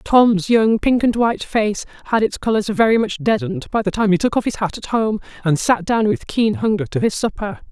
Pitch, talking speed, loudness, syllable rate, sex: 220 Hz, 240 wpm, -18 LUFS, 5.5 syllables/s, female